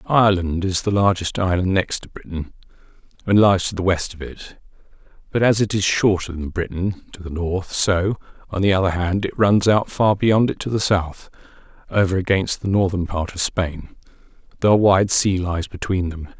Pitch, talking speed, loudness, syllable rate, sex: 95 Hz, 195 wpm, -20 LUFS, 4.9 syllables/s, male